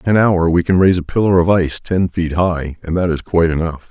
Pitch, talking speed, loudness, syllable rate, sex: 85 Hz, 275 wpm, -15 LUFS, 6.0 syllables/s, male